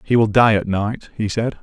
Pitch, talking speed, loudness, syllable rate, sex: 110 Hz, 260 wpm, -18 LUFS, 4.8 syllables/s, male